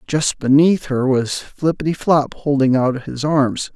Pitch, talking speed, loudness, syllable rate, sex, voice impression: 140 Hz, 145 wpm, -17 LUFS, 3.9 syllables/s, male, masculine, middle-aged, tensed, slightly powerful, slightly soft, slightly muffled, raspy, calm, slightly mature, wild, lively, slightly modest